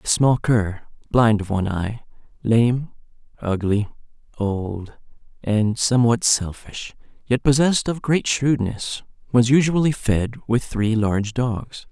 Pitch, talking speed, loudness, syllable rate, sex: 115 Hz, 125 wpm, -20 LUFS, 4.0 syllables/s, male